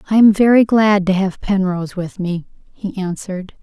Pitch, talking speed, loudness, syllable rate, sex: 190 Hz, 180 wpm, -16 LUFS, 5.2 syllables/s, female